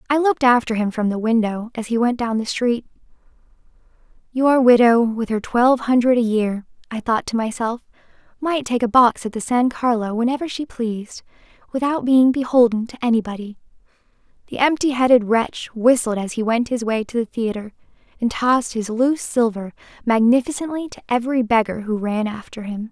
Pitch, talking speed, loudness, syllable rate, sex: 235 Hz, 175 wpm, -19 LUFS, 5.5 syllables/s, female